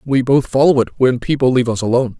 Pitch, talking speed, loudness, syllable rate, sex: 125 Hz, 245 wpm, -15 LUFS, 7.0 syllables/s, male